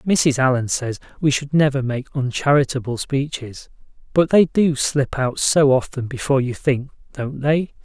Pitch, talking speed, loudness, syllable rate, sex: 135 Hz, 160 wpm, -19 LUFS, 4.5 syllables/s, male